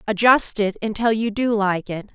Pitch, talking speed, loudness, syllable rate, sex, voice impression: 215 Hz, 195 wpm, -20 LUFS, 4.7 syllables/s, female, very feminine, slightly middle-aged, very thin, very tensed, slightly powerful, slightly bright, hard, very clear, very fluent, slightly cool, intellectual, slightly refreshing, sincere, calm, slightly friendly, slightly reassuring, very unique, slightly elegant, wild, sweet, lively, slightly strict, intense, slightly sharp, light